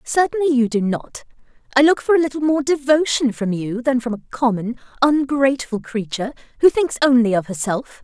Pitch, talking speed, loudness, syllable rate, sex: 255 Hz, 180 wpm, -19 LUFS, 5.4 syllables/s, female